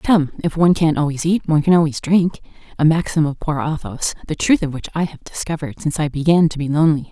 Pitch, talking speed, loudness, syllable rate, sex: 155 Hz, 230 wpm, -18 LUFS, 6.4 syllables/s, female